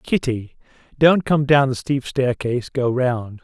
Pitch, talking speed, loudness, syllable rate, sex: 130 Hz, 155 wpm, -19 LUFS, 4.1 syllables/s, male